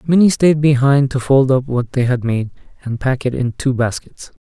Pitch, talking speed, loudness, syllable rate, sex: 130 Hz, 215 wpm, -16 LUFS, 4.9 syllables/s, male